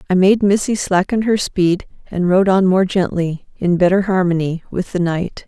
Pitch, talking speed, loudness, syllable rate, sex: 185 Hz, 185 wpm, -16 LUFS, 4.7 syllables/s, female